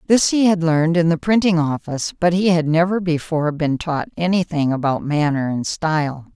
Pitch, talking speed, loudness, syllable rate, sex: 165 Hz, 200 wpm, -18 LUFS, 5.4 syllables/s, female